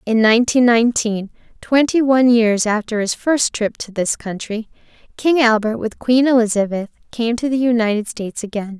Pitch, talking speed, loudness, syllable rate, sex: 230 Hz, 165 wpm, -17 LUFS, 5.2 syllables/s, female